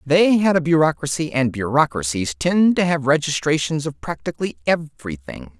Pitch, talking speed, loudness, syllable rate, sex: 140 Hz, 140 wpm, -19 LUFS, 5.2 syllables/s, male